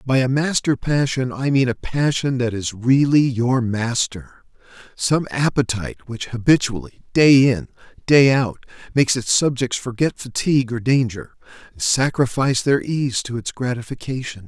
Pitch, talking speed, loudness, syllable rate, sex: 125 Hz, 145 wpm, -19 LUFS, 4.7 syllables/s, male